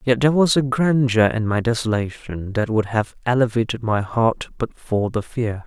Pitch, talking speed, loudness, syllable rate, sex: 115 Hz, 190 wpm, -20 LUFS, 4.9 syllables/s, male